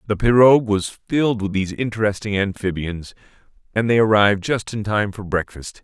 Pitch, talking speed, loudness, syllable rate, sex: 105 Hz, 165 wpm, -19 LUFS, 5.6 syllables/s, male